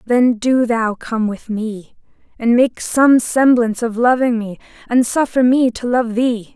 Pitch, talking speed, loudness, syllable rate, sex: 235 Hz, 175 wpm, -16 LUFS, 4.0 syllables/s, female